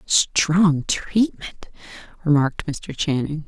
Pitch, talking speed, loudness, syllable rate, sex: 160 Hz, 85 wpm, -20 LUFS, 3.3 syllables/s, female